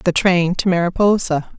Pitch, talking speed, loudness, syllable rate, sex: 180 Hz, 150 wpm, -17 LUFS, 4.6 syllables/s, female